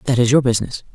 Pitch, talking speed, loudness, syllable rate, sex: 120 Hz, 255 wpm, -16 LUFS, 8.5 syllables/s, male